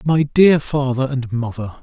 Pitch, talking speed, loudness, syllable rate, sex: 135 Hz, 165 wpm, -17 LUFS, 4.1 syllables/s, male